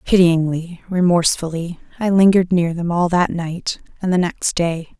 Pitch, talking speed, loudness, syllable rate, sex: 175 Hz, 155 wpm, -18 LUFS, 4.8 syllables/s, female